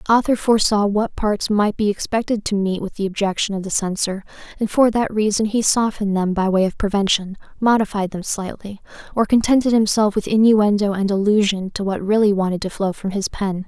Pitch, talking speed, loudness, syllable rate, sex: 205 Hz, 200 wpm, -19 LUFS, 5.7 syllables/s, female